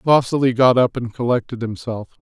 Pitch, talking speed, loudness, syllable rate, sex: 120 Hz, 160 wpm, -18 LUFS, 5.5 syllables/s, male